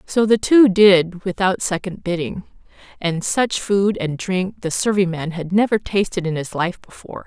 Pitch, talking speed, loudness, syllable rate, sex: 190 Hz, 180 wpm, -18 LUFS, 4.5 syllables/s, female